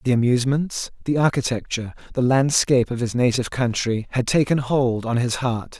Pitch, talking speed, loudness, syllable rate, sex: 125 Hz, 165 wpm, -21 LUFS, 5.5 syllables/s, male